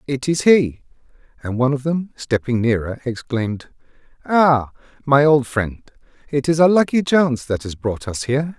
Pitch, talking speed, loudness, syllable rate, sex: 135 Hz, 170 wpm, -18 LUFS, 4.9 syllables/s, male